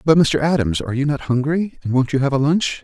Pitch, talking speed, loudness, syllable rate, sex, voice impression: 145 Hz, 275 wpm, -18 LUFS, 6.0 syllables/s, male, very masculine, slightly old, very thick, very tensed, powerful, slightly dark, soft, muffled, fluent, raspy, very cool, intellectual, slightly refreshing, sincere, calm, friendly, reassuring, very unique, elegant, very wild, sweet, lively, kind, slightly modest